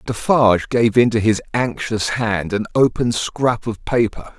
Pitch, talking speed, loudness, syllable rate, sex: 115 Hz, 150 wpm, -18 LUFS, 4.2 syllables/s, male